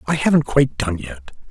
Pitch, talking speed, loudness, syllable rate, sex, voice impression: 125 Hz, 200 wpm, -19 LUFS, 5.8 syllables/s, male, masculine, middle-aged, tensed, powerful, muffled, raspy, mature, friendly, wild, lively, slightly strict